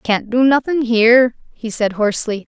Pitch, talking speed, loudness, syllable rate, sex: 235 Hz, 165 wpm, -15 LUFS, 4.9 syllables/s, female